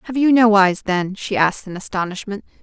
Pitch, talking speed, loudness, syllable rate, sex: 205 Hz, 205 wpm, -17 LUFS, 5.8 syllables/s, female